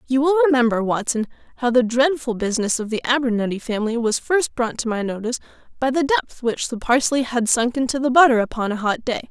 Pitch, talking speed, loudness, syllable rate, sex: 245 Hz, 215 wpm, -20 LUFS, 6.0 syllables/s, female